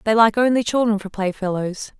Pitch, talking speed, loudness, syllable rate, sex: 210 Hz, 180 wpm, -19 LUFS, 5.5 syllables/s, female